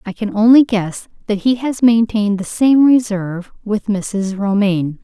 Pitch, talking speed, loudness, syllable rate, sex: 210 Hz, 165 wpm, -15 LUFS, 4.6 syllables/s, female